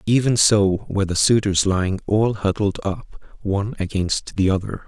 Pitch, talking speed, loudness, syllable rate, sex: 100 Hz, 160 wpm, -20 LUFS, 4.9 syllables/s, male